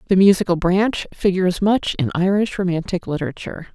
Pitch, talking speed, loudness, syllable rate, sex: 185 Hz, 145 wpm, -19 LUFS, 5.9 syllables/s, female